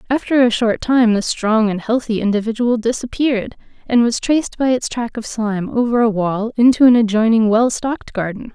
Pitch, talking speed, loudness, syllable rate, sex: 230 Hz, 190 wpm, -16 LUFS, 5.4 syllables/s, female